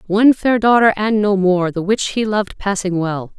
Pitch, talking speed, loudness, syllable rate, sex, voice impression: 200 Hz, 215 wpm, -16 LUFS, 5.0 syllables/s, female, slightly gender-neutral, adult-like, slightly middle-aged, slightly thin, tensed, powerful, bright, hard, very clear, fluent, cool, slightly intellectual, refreshing, sincere, calm, slightly friendly, slightly reassuring, slightly elegant, slightly strict, slightly sharp